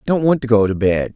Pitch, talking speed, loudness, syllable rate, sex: 115 Hz, 310 wpm, -16 LUFS, 5.9 syllables/s, male